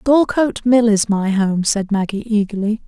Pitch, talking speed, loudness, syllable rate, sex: 215 Hz, 165 wpm, -17 LUFS, 4.7 syllables/s, female